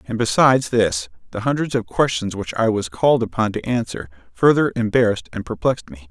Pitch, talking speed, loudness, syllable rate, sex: 110 Hz, 185 wpm, -19 LUFS, 5.9 syllables/s, male